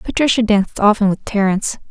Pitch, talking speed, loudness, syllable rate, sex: 210 Hz, 160 wpm, -16 LUFS, 6.4 syllables/s, female